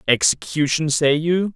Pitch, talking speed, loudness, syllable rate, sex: 150 Hz, 115 wpm, -19 LUFS, 4.3 syllables/s, male